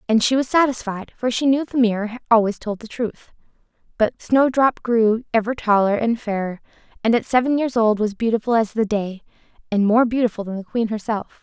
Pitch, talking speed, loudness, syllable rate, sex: 225 Hz, 195 wpm, -20 LUFS, 5.5 syllables/s, female